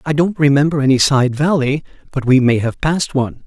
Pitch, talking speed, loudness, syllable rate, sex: 140 Hz, 210 wpm, -15 LUFS, 5.8 syllables/s, male